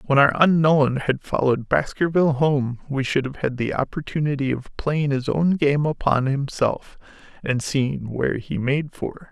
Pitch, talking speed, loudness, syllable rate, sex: 140 Hz, 165 wpm, -22 LUFS, 4.6 syllables/s, male